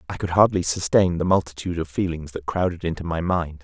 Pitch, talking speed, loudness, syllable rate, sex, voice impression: 85 Hz, 215 wpm, -22 LUFS, 6.1 syllables/s, male, masculine, middle-aged, thick, tensed, powerful, hard, raspy, intellectual, calm, mature, wild, lively, strict, slightly sharp